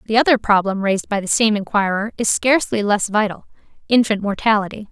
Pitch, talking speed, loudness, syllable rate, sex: 210 Hz, 170 wpm, -18 LUFS, 6.1 syllables/s, female